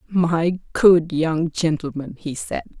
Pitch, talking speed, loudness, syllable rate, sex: 160 Hz, 130 wpm, -20 LUFS, 3.5 syllables/s, female